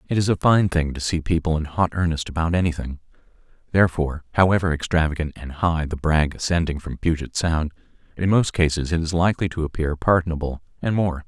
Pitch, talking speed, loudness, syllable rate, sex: 85 Hz, 185 wpm, -22 LUFS, 6.1 syllables/s, male